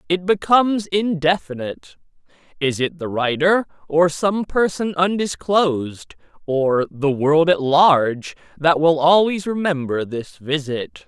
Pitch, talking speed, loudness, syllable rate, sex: 155 Hz, 120 wpm, -19 LUFS, 4.0 syllables/s, male